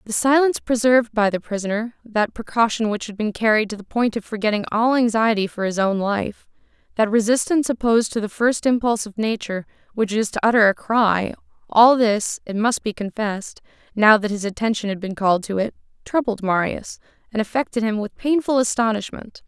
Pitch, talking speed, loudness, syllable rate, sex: 220 Hz, 190 wpm, -20 LUFS, 5.7 syllables/s, female